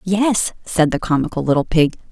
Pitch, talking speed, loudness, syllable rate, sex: 175 Hz, 170 wpm, -18 LUFS, 5.1 syllables/s, female